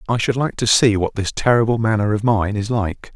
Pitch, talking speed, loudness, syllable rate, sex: 110 Hz, 245 wpm, -18 LUFS, 5.4 syllables/s, male